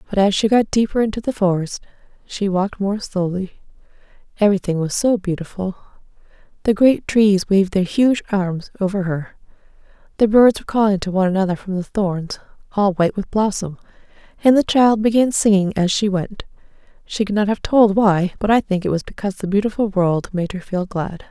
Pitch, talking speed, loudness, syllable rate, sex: 200 Hz, 185 wpm, -18 LUFS, 5.6 syllables/s, female